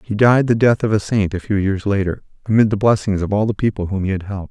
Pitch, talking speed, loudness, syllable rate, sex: 100 Hz, 295 wpm, -17 LUFS, 6.4 syllables/s, male